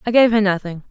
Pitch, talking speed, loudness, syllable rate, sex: 205 Hz, 265 wpm, -17 LUFS, 6.8 syllables/s, female